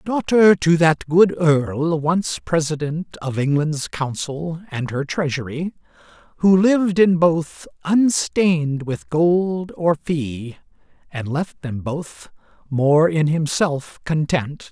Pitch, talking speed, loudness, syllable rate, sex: 160 Hz, 120 wpm, -19 LUFS, 3.2 syllables/s, male